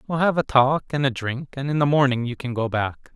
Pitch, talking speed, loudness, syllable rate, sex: 135 Hz, 285 wpm, -22 LUFS, 5.6 syllables/s, male